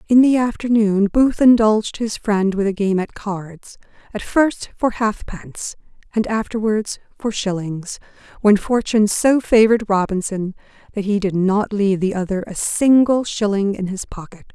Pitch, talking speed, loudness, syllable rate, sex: 210 Hz, 155 wpm, -18 LUFS, 4.7 syllables/s, female